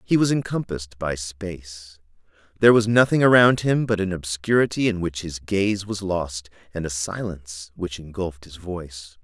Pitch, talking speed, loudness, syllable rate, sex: 95 Hz, 170 wpm, -22 LUFS, 5.0 syllables/s, male